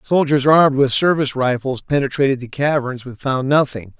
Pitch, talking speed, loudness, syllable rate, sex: 135 Hz, 165 wpm, -17 LUFS, 5.5 syllables/s, male